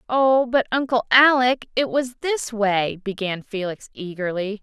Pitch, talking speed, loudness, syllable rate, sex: 225 Hz, 145 wpm, -20 LUFS, 4.1 syllables/s, female